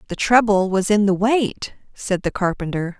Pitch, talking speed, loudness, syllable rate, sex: 200 Hz, 180 wpm, -19 LUFS, 4.6 syllables/s, female